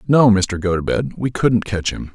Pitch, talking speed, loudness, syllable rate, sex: 105 Hz, 195 wpm, -18 LUFS, 4.6 syllables/s, male